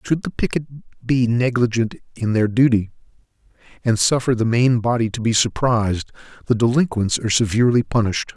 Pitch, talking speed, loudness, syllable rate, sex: 120 Hz, 160 wpm, -19 LUFS, 7.2 syllables/s, male